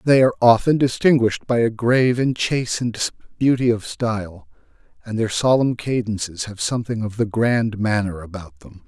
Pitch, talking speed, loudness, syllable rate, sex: 115 Hz, 160 wpm, -20 LUFS, 5.2 syllables/s, male